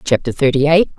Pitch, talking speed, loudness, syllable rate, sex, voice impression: 145 Hz, 185 wpm, -15 LUFS, 6.0 syllables/s, female, feminine, adult-like, tensed, powerful, clear, slightly raspy, intellectual, slightly friendly, lively, slightly sharp